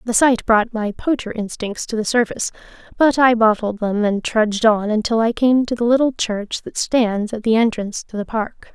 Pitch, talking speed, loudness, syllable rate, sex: 225 Hz, 215 wpm, -18 LUFS, 5.0 syllables/s, female